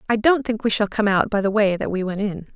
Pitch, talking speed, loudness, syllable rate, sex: 210 Hz, 330 wpm, -20 LUFS, 5.9 syllables/s, female